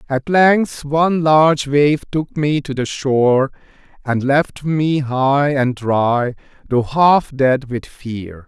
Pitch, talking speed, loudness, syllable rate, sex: 140 Hz, 150 wpm, -16 LUFS, 3.3 syllables/s, male